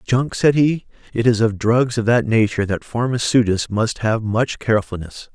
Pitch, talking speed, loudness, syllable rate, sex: 115 Hz, 180 wpm, -18 LUFS, 4.9 syllables/s, male